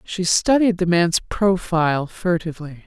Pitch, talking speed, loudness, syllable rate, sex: 175 Hz, 125 wpm, -19 LUFS, 4.3 syllables/s, female